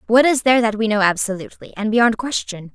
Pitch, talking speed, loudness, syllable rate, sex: 225 Hz, 220 wpm, -17 LUFS, 6.4 syllables/s, female